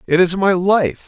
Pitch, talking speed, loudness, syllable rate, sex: 180 Hz, 225 wpm, -15 LUFS, 4.3 syllables/s, male